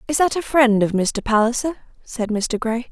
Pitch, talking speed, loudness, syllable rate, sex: 240 Hz, 205 wpm, -19 LUFS, 4.9 syllables/s, female